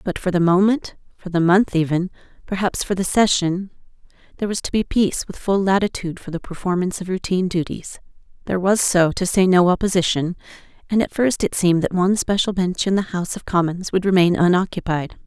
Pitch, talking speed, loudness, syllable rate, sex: 185 Hz, 195 wpm, -19 LUFS, 6.1 syllables/s, female